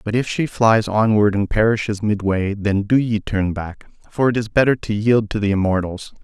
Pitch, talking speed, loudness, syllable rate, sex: 105 Hz, 210 wpm, -18 LUFS, 5.0 syllables/s, male